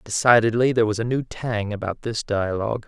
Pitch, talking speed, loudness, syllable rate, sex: 110 Hz, 190 wpm, -22 LUFS, 5.8 syllables/s, male